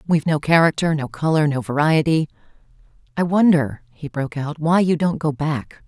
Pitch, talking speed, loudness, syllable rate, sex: 155 Hz, 165 wpm, -19 LUFS, 5.2 syllables/s, female